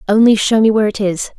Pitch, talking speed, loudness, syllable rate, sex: 210 Hz, 260 wpm, -13 LUFS, 6.8 syllables/s, female